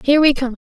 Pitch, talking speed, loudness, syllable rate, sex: 270 Hz, 250 wpm, -16 LUFS, 8.3 syllables/s, female